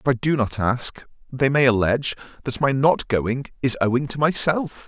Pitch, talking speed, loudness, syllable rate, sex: 130 Hz, 210 wpm, -21 LUFS, 5.3 syllables/s, male